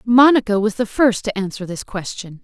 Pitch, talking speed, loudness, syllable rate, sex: 215 Hz, 195 wpm, -18 LUFS, 5.2 syllables/s, female